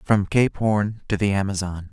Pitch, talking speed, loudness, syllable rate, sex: 100 Hz, 190 wpm, -22 LUFS, 4.5 syllables/s, male